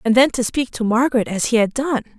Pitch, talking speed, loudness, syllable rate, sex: 240 Hz, 275 wpm, -18 LUFS, 6.2 syllables/s, female